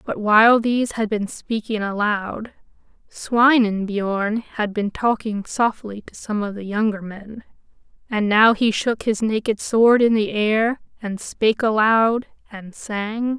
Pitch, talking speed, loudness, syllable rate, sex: 215 Hz, 150 wpm, -20 LUFS, 3.8 syllables/s, female